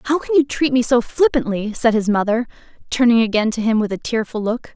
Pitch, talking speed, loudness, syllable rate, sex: 235 Hz, 225 wpm, -18 LUFS, 5.8 syllables/s, female